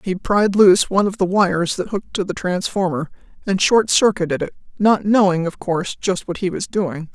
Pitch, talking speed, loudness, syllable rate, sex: 190 Hz, 210 wpm, -18 LUFS, 5.4 syllables/s, female